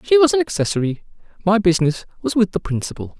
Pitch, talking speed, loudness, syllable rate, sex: 195 Hz, 190 wpm, -19 LUFS, 6.7 syllables/s, male